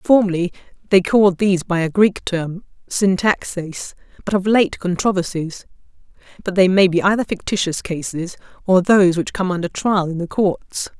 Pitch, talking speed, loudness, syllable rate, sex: 185 Hz, 160 wpm, -18 LUFS, 5.0 syllables/s, female